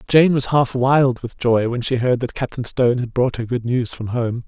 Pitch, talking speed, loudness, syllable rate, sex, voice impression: 125 Hz, 255 wpm, -19 LUFS, 4.9 syllables/s, male, masculine, adult-like, fluent, cool, slightly intellectual, slightly refreshing